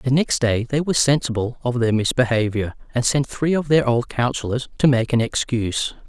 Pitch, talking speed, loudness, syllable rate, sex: 125 Hz, 195 wpm, -20 LUFS, 5.3 syllables/s, male